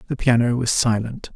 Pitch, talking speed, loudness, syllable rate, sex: 120 Hz, 180 wpm, -19 LUFS, 5.2 syllables/s, male